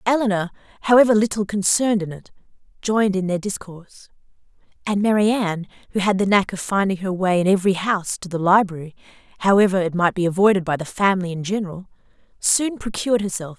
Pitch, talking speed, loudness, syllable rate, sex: 195 Hz, 180 wpm, -20 LUFS, 6.6 syllables/s, female